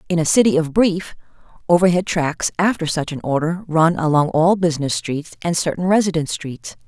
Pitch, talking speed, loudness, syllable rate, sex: 165 Hz, 175 wpm, -18 LUFS, 5.4 syllables/s, female